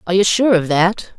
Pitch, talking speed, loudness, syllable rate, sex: 190 Hz, 255 wpm, -15 LUFS, 5.9 syllables/s, female